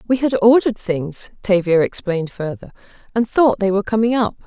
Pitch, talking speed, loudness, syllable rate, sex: 205 Hz, 175 wpm, -18 LUFS, 5.7 syllables/s, female